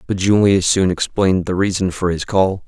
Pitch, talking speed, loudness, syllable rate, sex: 95 Hz, 200 wpm, -16 LUFS, 5.1 syllables/s, male